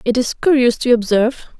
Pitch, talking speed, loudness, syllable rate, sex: 245 Hz, 190 wpm, -15 LUFS, 5.4 syllables/s, female